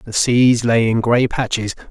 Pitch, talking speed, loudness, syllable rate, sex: 115 Hz, 190 wpm, -16 LUFS, 4.0 syllables/s, male